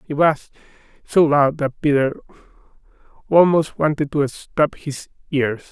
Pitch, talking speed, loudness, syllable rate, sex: 145 Hz, 125 wpm, -19 LUFS, 4.1 syllables/s, male